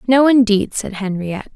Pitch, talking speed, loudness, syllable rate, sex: 220 Hz, 155 wpm, -16 LUFS, 5.0 syllables/s, female